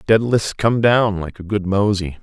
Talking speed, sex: 190 wpm, male